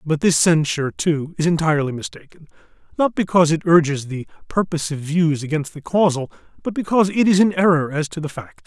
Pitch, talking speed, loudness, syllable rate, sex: 165 Hz, 185 wpm, -19 LUFS, 6.1 syllables/s, male